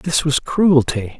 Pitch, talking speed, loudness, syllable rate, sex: 145 Hz, 150 wpm, -16 LUFS, 3.5 syllables/s, male